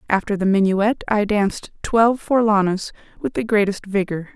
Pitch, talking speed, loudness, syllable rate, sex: 205 Hz, 150 wpm, -19 LUFS, 5.1 syllables/s, female